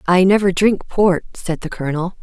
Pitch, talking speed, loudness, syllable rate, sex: 185 Hz, 190 wpm, -17 LUFS, 5.1 syllables/s, female